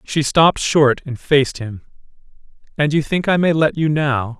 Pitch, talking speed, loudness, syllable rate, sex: 145 Hz, 190 wpm, -16 LUFS, 4.8 syllables/s, male